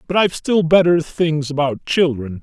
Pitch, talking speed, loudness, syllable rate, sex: 160 Hz, 175 wpm, -17 LUFS, 4.9 syllables/s, male